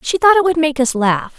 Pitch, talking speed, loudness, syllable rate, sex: 295 Hz, 305 wpm, -14 LUFS, 5.4 syllables/s, female